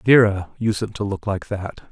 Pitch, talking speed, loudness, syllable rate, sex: 100 Hz, 190 wpm, -21 LUFS, 4.6 syllables/s, male